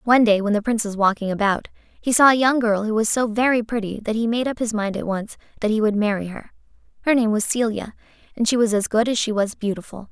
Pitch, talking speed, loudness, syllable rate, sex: 220 Hz, 260 wpm, -20 LUFS, 6.2 syllables/s, female